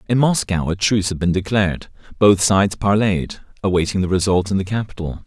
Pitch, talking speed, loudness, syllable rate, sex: 100 Hz, 180 wpm, -18 LUFS, 5.9 syllables/s, male